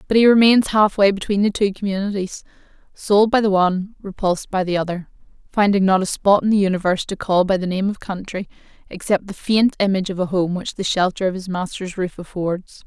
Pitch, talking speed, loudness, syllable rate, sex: 195 Hz, 215 wpm, -19 LUFS, 5.8 syllables/s, female